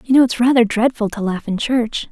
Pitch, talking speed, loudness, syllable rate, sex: 230 Hz, 255 wpm, -17 LUFS, 5.5 syllables/s, female